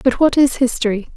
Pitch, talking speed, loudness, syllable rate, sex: 250 Hz, 205 wpm, -16 LUFS, 5.9 syllables/s, female